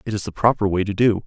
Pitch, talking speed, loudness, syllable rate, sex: 105 Hz, 335 wpm, -20 LUFS, 7.0 syllables/s, male